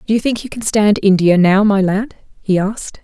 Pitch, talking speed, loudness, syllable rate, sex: 205 Hz, 235 wpm, -14 LUFS, 5.2 syllables/s, female